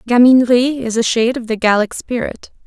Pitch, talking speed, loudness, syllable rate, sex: 235 Hz, 180 wpm, -14 LUFS, 6.0 syllables/s, female